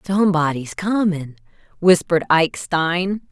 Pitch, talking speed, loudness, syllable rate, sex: 175 Hz, 90 wpm, -19 LUFS, 3.8 syllables/s, female